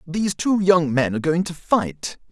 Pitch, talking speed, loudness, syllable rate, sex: 170 Hz, 205 wpm, -20 LUFS, 4.7 syllables/s, male